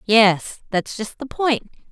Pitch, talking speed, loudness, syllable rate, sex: 230 Hz, 155 wpm, -21 LUFS, 3.3 syllables/s, female